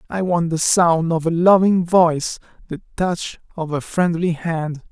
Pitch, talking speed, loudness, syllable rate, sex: 170 Hz, 170 wpm, -18 LUFS, 4.2 syllables/s, male